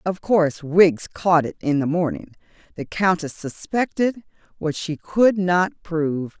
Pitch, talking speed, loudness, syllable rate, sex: 170 Hz, 150 wpm, -21 LUFS, 4.1 syllables/s, female